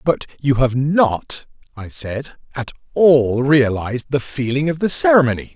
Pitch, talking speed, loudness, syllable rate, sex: 135 Hz, 150 wpm, -17 LUFS, 4.4 syllables/s, male